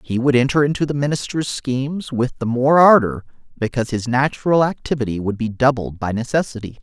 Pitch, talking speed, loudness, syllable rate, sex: 130 Hz, 175 wpm, -18 LUFS, 5.8 syllables/s, male